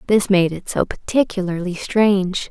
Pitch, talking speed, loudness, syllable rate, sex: 195 Hz, 145 wpm, -19 LUFS, 4.7 syllables/s, female